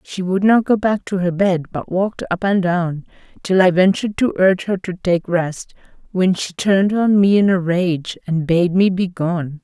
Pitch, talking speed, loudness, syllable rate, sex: 185 Hz, 220 wpm, -17 LUFS, 4.7 syllables/s, female